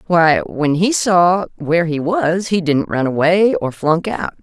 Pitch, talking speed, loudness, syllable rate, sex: 175 Hz, 190 wpm, -16 LUFS, 4.0 syllables/s, female